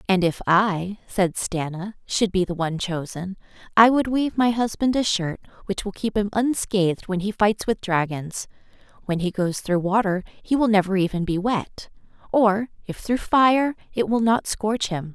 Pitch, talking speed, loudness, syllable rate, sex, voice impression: 200 Hz, 185 wpm, -22 LUFS, 4.6 syllables/s, female, feminine, adult-like, clear, fluent, intellectual, slightly elegant